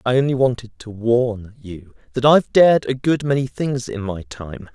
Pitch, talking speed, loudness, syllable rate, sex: 120 Hz, 200 wpm, -18 LUFS, 4.8 syllables/s, male